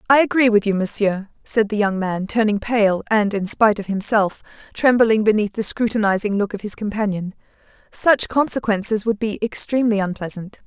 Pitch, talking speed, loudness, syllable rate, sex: 210 Hz, 170 wpm, -19 LUFS, 5.4 syllables/s, female